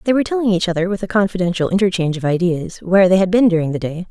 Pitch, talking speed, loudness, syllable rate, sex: 185 Hz, 265 wpm, -17 LUFS, 7.7 syllables/s, female